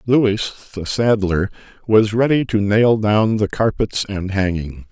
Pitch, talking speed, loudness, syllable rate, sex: 105 Hz, 145 wpm, -18 LUFS, 4.1 syllables/s, male